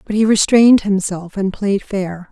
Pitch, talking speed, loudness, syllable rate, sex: 200 Hz, 180 wpm, -15 LUFS, 4.5 syllables/s, female